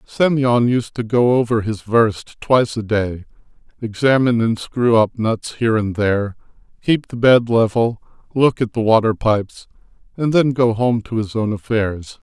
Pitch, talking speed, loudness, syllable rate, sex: 115 Hz, 170 wpm, -17 LUFS, 4.6 syllables/s, male